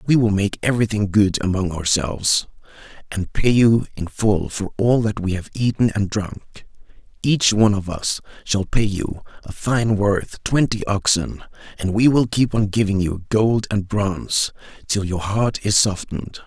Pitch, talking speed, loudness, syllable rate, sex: 100 Hz, 170 wpm, -20 LUFS, 4.5 syllables/s, male